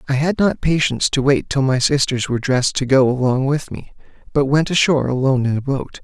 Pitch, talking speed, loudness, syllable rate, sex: 135 Hz, 230 wpm, -17 LUFS, 6.0 syllables/s, male